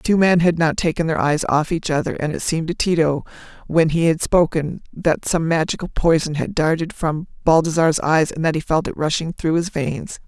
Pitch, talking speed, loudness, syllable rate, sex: 160 Hz, 220 wpm, -19 LUFS, 5.4 syllables/s, female